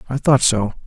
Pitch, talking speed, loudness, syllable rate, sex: 125 Hz, 210 wpm, -17 LUFS, 5.5 syllables/s, male